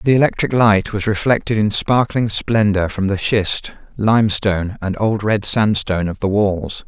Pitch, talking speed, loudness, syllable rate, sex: 105 Hz, 165 wpm, -17 LUFS, 4.6 syllables/s, male